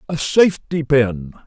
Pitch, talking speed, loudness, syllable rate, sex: 140 Hz, 125 wpm, -17 LUFS, 4.2 syllables/s, male